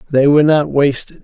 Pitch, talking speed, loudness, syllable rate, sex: 145 Hz, 195 wpm, -13 LUFS, 5.8 syllables/s, male